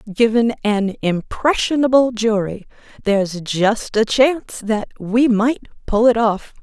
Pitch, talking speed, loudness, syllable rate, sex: 220 Hz, 125 wpm, -17 LUFS, 4.0 syllables/s, female